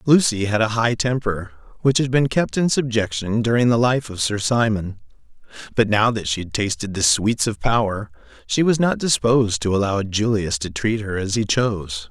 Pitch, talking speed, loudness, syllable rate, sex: 110 Hz, 195 wpm, -20 LUFS, 4.9 syllables/s, male